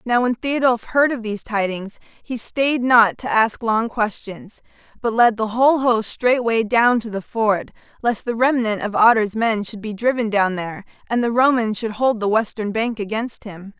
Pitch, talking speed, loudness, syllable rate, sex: 225 Hz, 195 wpm, -19 LUFS, 4.6 syllables/s, female